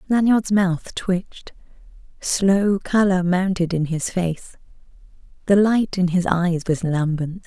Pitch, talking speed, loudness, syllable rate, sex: 185 Hz, 130 wpm, -20 LUFS, 3.8 syllables/s, female